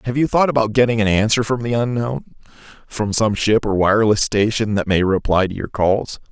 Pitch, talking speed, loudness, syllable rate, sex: 110 Hz, 200 wpm, -17 LUFS, 5.5 syllables/s, male